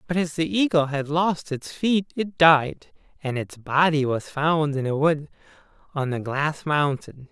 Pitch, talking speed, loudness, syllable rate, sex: 155 Hz, 180 wpm, -23 LUFS, 4.1 syllables/s, male